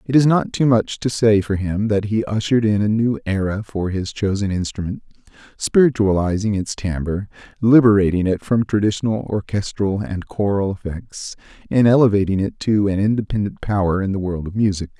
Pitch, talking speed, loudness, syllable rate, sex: 105 Hz, 170 wpm, -19 LUFS, 5.4 syllables/s, male